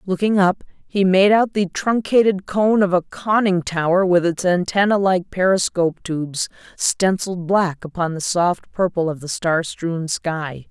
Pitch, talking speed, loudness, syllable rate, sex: 180 Hz, 165 wpm, -19 LUFS, 4.4 syllables/s, female